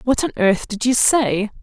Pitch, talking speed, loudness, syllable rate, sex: 230 Hz, 220 wpm, -17 LUFS, 4.4 syllables/s, female